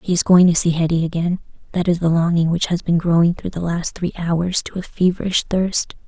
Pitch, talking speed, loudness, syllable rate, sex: 170 Hz, 235 wpm, -18 LUFS, 5.5 syllables/s, female